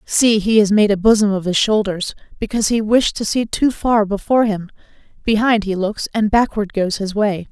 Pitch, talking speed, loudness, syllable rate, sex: 210 Hz, 210 wpm, -17 LUFS, 5.2 syllables/s, female